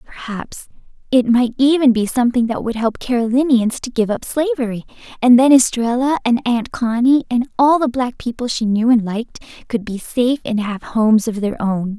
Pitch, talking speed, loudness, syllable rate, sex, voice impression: 240 Hz, 190 wpm, -17 LUFS, 5.2 syllables/s, female, very feminine, very young, very thin, tensed, slightly weak, very bright, soft, very clear, very fluent, slightly nasal, very cute, slightly intellectual, very refreshing, slightly sincere, slightly calm, very friendly, very reassuring, very unique, slightly elegant, slightly wild, very sweet, very lively, very kind, very sharp, very light